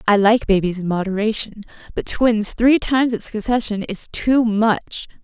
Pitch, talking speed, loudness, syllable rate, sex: 215 Hz, 160 wpm, -18 LUFS, 4.9 syllables/s, female